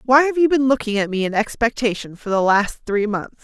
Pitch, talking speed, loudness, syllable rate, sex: 230 Hz, 245 wpm, -19 LUFS, 5.5 syllables/s, female